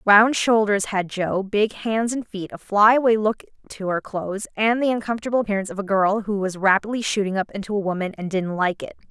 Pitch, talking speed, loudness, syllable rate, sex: 205 Hz, 220 wpm, -21 LUFS, 5.6 syllables/s, female